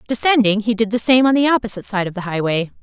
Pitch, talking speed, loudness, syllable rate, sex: 220 Hz, 255 wpm, -17 LUFS, 7.0 syllables/s, female